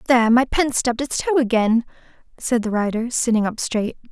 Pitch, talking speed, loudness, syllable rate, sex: 235 Hz, 190 wpm, -20 LUFS, 5.5 syllables/s, female